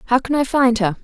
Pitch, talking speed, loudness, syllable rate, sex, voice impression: 245 Hz, 290 wpm, -17 LUFS, 5.2 syllables/s, female, very feminine, adult-like, fluent, slightly sincere, slightly elegant